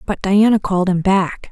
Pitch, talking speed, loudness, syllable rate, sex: 195 Hz, 200 wpm, -16 LUFS, 5.0 syllables/s, female